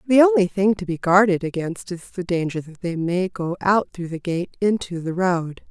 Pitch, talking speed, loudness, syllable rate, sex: 185 Hz, 220 wpm, -21 LUFS, 4.8 syllables/s, female